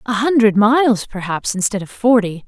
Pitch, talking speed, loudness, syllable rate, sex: 220 Hz, 170 wpm, -16 LUFS, 5.1 syllables/s, female